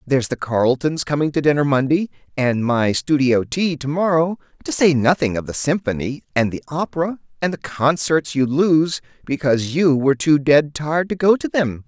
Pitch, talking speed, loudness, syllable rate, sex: 145 Hz, 185 wpm, -19 LUFS, 5.2 syllables/s, male